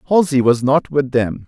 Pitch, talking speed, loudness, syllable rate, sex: 135 Hz, 205 wpm, -16 LUFS, 4.8 syllables/s, male